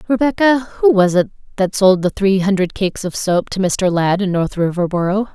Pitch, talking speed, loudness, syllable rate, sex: 195 Hz, 200 wpm, -16 LUFS, 5.3 syllables/s, female